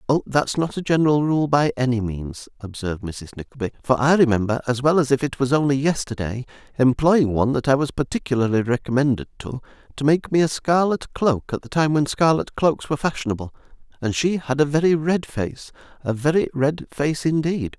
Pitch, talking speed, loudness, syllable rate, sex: 135 Hz, 190 wpm, -21 LUFS, 5.6 syllables/s, male